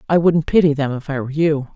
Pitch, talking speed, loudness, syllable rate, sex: 150 Hz, 275 wpm, -17 LUFS, 6.5 syllables/s, female